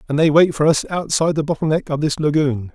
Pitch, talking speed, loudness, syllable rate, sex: 150 Hz, 260 wpm, -18 LUFS, 6.3 syllables/s, male